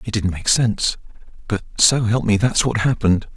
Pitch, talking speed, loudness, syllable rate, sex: 110 Hz, 195 wpm, -18 LUFS, 5.4 syllables/s, male